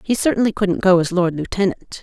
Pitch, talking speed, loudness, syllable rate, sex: 190 Hz, 205 wpm, -18 LUFS, 5.7 syllables/s, female